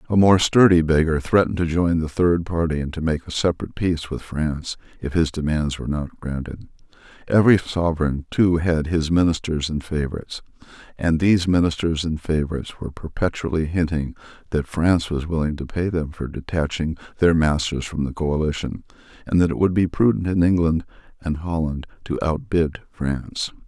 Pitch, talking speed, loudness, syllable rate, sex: 80 Hz, 170 wpm, -21 LUFS, 5.6 syllables/s, male